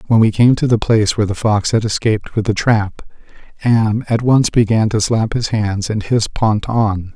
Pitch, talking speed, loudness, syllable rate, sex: 110 Hz, 220 wpm, -15 LUFS, 4.9 syllables/s, male